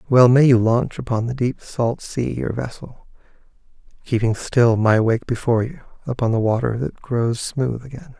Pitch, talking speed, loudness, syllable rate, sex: 120 Hz, 175 wpm, -20 LUFS, 4.7 syllables/s, male